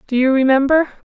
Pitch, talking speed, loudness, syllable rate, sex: 275 Hz, 160 wpm, -15 LUFS, 5.7 syllables/s, female